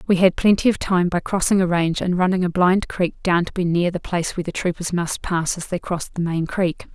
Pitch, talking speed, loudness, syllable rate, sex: 180 Hz, 270 wpm, -20 LUFS, 5.9 syllables/s, female